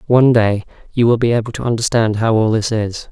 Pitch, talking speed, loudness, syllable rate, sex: 115 Hz, 230 wpm, -16 LUFS, 6.0 syllables/s, male